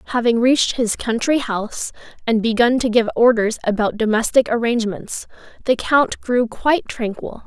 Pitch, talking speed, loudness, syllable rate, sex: 235 Hz, 145 wpm, -18 LUFS, 5.1 syllables/s, female